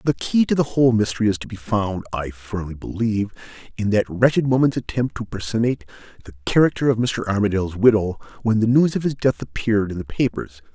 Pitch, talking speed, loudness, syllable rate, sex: 110 Hz, 200 wpm, -21 LUFS, 6.2 syllables/s, male